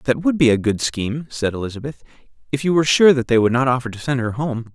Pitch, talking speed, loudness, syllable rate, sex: 130 Hz, 265 wpm, -18 LUFS, 6.7 syllables/s, male